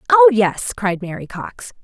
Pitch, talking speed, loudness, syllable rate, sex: 230 Hz, 165 wpm, -17 LUFS, 4.1 syllables/s, female